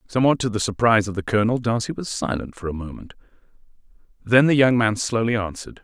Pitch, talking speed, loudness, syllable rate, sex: 110 Hz, 195 wpm, -21 LUFS, 6.8 syllables/s, male